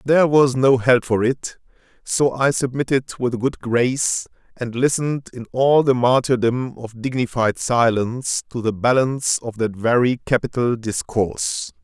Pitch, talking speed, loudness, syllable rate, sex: 125 Hz, 150 wpm, -19 LUFS, 4.6 syllables/s, male